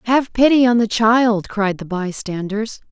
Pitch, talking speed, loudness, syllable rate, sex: 220 Hz, 165 wpm, -17 LUFS, 4.1 syllables/s, female